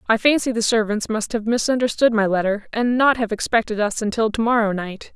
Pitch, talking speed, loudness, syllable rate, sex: 225 Hz, 210 wpm, -20 LUFS, 5.7 syllables/s, female